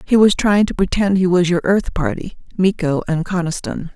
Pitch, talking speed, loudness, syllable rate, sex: 185 Hz, 195 wpm, -17 LUFS, 5.0 syllables/s, female